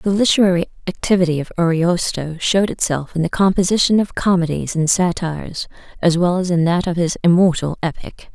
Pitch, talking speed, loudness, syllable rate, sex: 175 Hz, 165 wpm, -17 LUFS, 5.6 syllables/s, female